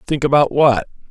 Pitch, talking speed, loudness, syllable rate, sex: 135 Hz, 165 wpm, -15 LUFS, 5.3 syllables/s, male